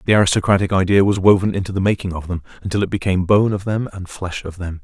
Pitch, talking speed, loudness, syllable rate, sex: 95 Hz, 250 wpm, -18 LUFS, 6.9 syllables/s, male